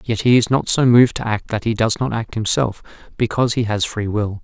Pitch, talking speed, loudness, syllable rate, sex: 115 Hz, 255 wpm, -18 LUFS, 5.8 syllables/s, male